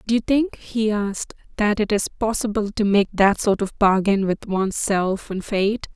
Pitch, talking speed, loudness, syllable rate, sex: 205 Hz, 200 wpm, -21 LUFS, 4.7 syllables/s, female